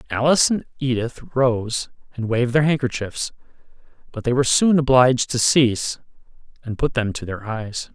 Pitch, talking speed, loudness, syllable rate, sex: 125 Hz, 160 wpm, -20 LUFS, 5.2 syllables/s, male